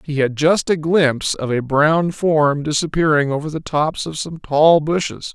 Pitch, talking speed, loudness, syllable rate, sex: 155 Hz, 190 wpm, -17 LUFS, 4.4 syllables/s, male